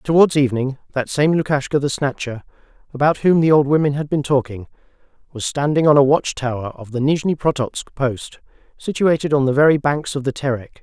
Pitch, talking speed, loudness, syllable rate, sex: 140 Hz, 190 wpm, -18 LUFS, 5.6 syllables/s, male